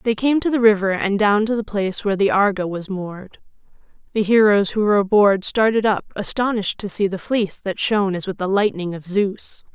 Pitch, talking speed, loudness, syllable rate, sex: 205 Hz, 215 wpm, -19 LUFS, 5.8 syllables/s, female